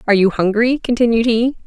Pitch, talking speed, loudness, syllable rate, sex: 230 Hz, 180 wpm, -15 LUFS, 6.2 syllables/s, female